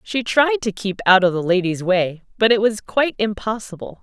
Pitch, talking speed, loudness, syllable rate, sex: 205 Hz, 210 wpm, -18 LUFS, 5.1 syllables/s, female